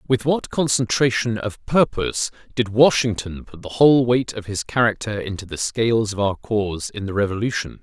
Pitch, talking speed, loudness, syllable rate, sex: 110 Hz, 175 wpm, -20 LUFS, 5.2 syllables/s, male